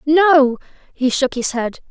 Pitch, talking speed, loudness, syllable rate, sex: 275 Hz, 155 wpm, -16 LUFS, 3.5 syllables/s, female